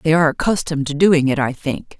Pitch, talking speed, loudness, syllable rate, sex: 150 Hz, 240 wpm, -17 LUFS, 6.4 syllables/s, female